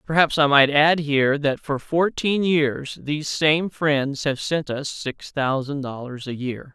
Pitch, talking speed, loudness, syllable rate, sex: 145 Hz, 180 wpm, -21 LUFS, 4.0 syllables/s, male